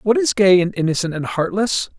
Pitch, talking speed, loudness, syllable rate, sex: 185 Hz, 210 wpm, -17 LUFS, 5.3 syllables/s, male